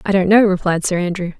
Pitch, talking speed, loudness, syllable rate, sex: 185 Hz, 260 wpm, -16 LUFS, 6.4 syllables/s, female